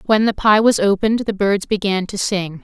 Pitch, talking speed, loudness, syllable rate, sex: 205 Hz, 230 wpm, -17 LUFS, 5.2 syllables/s, female